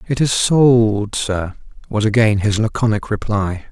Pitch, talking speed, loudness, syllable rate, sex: 110 Hz, 145 wpm, -16 LUFS, 4.1 syllables/s, male